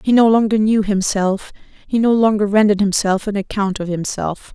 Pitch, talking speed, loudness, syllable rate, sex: 205 Hz, 185 wpm, -17 LUFS, 5.4 syllables/s, female